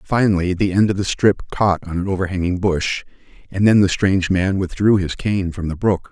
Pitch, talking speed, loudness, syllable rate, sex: 95 Hz, 215 wpm, -18 LUFS, 5.3 syllables/s, male